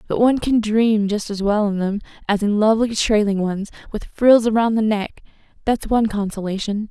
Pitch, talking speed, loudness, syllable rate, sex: 215 Hz, 190 wpm, -19 LUFS, 5.4 syllables/s, female